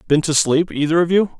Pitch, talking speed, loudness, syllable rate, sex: 160 Hz, 260 wpm, -17 LUFS, 5.9 syllables/s, male